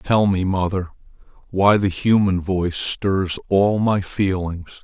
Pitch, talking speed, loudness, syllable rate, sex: 95 Hz, 135 wpm, -20 LUFS, 3.7 syllables/s, male